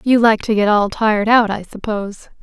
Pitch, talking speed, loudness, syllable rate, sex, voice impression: 215 Hz, 225 wpm, -16 LUFS, 5.4 syllables/s, female, very feminine, young, thin, slightly tensed, powerful, slightly dark, slightly soft, slightly muffled, fluent, slightly raspy, cute, slightly cool, intellectual, sincere, calm, very friendly, very reassuring, unique, elegant, slightly wild, very sweet, lively, kind, slightly intense, slightly modest, light